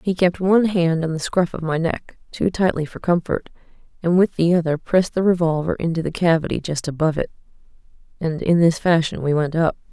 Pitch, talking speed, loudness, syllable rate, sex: 170 Hz, 195 wpm, -20 LUFS, 5.8 syllables/s, female